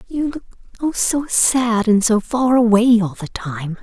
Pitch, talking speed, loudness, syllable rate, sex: 230 Hz, 190 wpm, -17 LUFS, 4.4 syllables/s, female